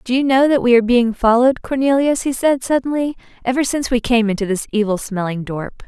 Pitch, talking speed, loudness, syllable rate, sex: 245 Hz, 215 wpm, -17 LUFS, 6.1 syllables/s, female